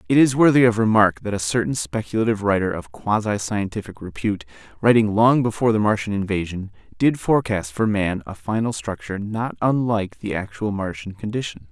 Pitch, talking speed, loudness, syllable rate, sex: 105 Hz, 170 wpm, -21 LUFS, 5.8 syllables/s, male